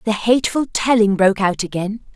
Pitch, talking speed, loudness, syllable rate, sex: 215 Hz, 165 wpm, -17 LUFS, 5.6 syllables/s, female